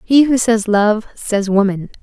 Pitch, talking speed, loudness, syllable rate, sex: 220 Hz, 180 wpm, -15 LUFS, 3.9 syllables/s, female